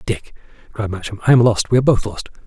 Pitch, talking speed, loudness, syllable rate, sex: 110 Hz, 245 wpm, -17 LUFS, 6.9 syllables/s, male